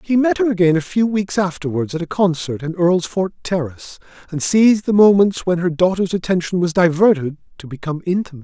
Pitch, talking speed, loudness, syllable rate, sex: 180 Hz, 190 wpm, -17 LUFS, 6.0 syllables/s, male